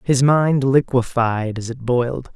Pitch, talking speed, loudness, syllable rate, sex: 125 Hz, 155 wpm, -18 LUFS, 4.0 syllables/s, male